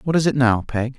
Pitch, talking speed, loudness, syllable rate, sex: 130 Hz, 305 wpm, -19 LUFS, 5.8 syllables/s, male